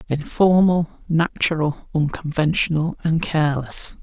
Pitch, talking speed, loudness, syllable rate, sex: 160 Hz, 75 wpm, -20 LUFS, 4.2 syllables/s, male